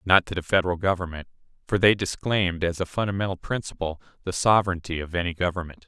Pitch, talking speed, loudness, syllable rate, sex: 90 Hz, 175 wpm, -25 LUFS, 6.6 syllables/s, male